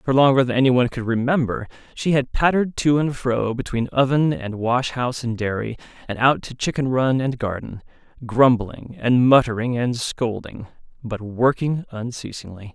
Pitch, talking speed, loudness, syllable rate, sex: 125 Hz, 160 wpm, -21 LUFS, 4.9 syllables/s, male